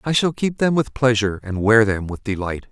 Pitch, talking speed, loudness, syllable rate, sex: 115 Hz, 245 wpm, -19 LUFS, 5.4 syllables/s, male